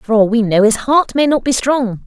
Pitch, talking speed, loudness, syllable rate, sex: 240 Hz, 290 wpm, -14 LUFS, 4.9 syllables/s, female